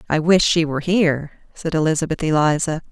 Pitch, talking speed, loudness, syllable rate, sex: 160 Hz, 165 wpm, -18 LUFS, 6.2 syllables/s, female